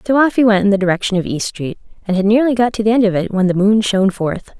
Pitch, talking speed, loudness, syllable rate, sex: 205 Hz, 315 wpm, -15 LUFS, 6.7 syllables/s, female